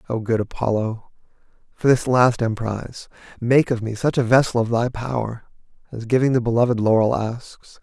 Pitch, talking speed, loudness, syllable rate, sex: 120 Hz, 170 wpm, -20 LUFS, 5.1 syllables/s, male